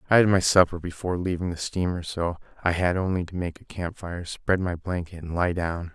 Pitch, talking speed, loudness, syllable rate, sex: 90 Hz, 220 wpm, -26 LUFS, 5.7 syllables/s, male